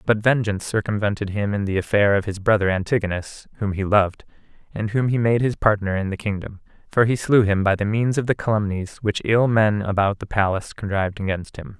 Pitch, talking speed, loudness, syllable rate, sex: 105 Hz, 215 wpm, -21 LUFS, 5.8 syllables/s, male